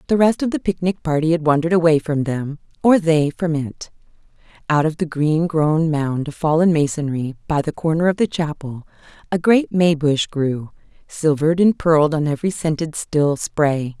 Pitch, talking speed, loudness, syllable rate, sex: 160 Hz, 185 wpm, -18 LUFS, 5.0 syllables/s, female